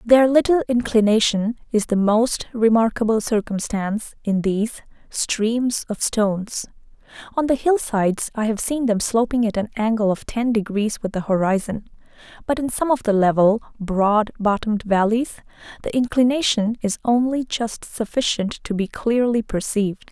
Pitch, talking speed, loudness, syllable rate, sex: 220 Hz, 150 wpm, -20 LUFS, 4.8 syllables/s, female